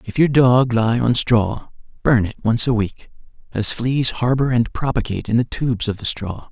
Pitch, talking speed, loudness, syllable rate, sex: 120 Hz, 205 wpm, -18 LUFS, 4.8 syllables/s, male